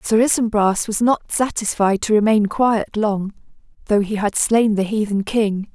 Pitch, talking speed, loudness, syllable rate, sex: 215 Hz, 165 wpm, -18 LUFS, 4.3 syllables/s, female